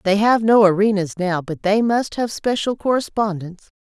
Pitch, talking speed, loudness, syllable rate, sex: 205 Hz, 175 wpm, -18 LUFS, 4.8 syllables/s, female